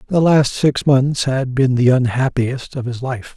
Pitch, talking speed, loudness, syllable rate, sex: 130 Hz, 195 wpm, -17 LUFS, 4.2 syllables/s, male